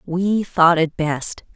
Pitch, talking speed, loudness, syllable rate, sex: 170 Hz, 155 wpm, -18 LUFS, 2.9 syllables/s, female